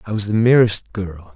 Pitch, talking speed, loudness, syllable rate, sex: 105 Hz, 220 wpm, -16 LUFS, 4.8 syllables/s, male